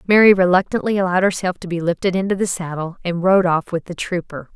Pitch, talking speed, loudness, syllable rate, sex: 180 Hz, 210 wpm, -18 LUFS, 6.3 syllables/s, female